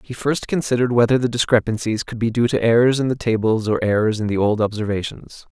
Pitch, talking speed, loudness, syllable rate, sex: 115 Hz, 215 wpm, -19 LUFS, 6.1 syllables/s, male